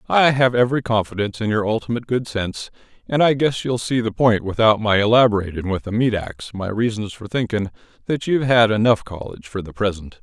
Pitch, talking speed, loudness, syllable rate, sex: 110 Hz, 205 wpm, -19 LUFS, 6.0 syllables/s, male